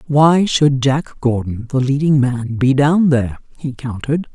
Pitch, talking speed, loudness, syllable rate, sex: 135 Hz, 165 wpm, -16 LUFS, 4.5 syllables/s, female